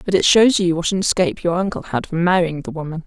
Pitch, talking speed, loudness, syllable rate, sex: 175 Hz, 275 wpm, -18 LUFS, 6.4 syllables/s, female